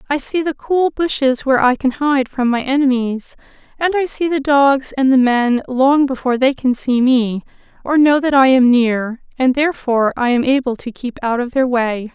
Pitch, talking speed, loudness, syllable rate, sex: 260 Hz, 210 wpm, -15 LUFS, 4.9 syllables/s, female